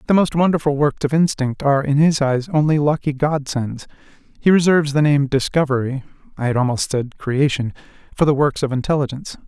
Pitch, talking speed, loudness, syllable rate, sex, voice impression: 145 Hz, 170 wpm, -18 LUFS, 5.9 syllables/s, male, masculine, adult-like, relaxed, weak, soft, slightly muffled, fluent, intellectual, sincere, calm, friendly, reassuring, unique, kind, modest